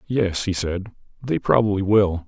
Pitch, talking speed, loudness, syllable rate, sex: 100 Hz, 160 wpm, -21 LUFS, 4.4 syllables/s, male